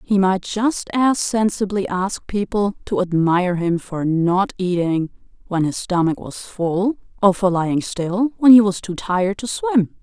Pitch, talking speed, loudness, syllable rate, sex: 195 Hz, 175 wpm, -19 LUFS, 4.2 syllables/s, female